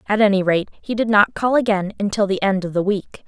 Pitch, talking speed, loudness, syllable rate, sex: 200 Hz, 255 wpm, -19 LUFS, 5.7 syllables/s, female